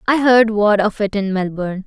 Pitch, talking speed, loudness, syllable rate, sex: 210 Hz, 225 wpm, -16 LUFS, 5.2 syllables/s, female